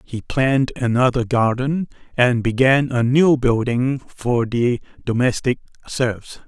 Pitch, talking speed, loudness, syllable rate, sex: 125 Hz, 120 wpm, -19 LUFS, 3.8 syllables/s, male